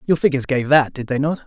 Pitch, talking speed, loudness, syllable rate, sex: 140 Hz, 285 wpm, -18 LUFS, 6.9 syllables/s, male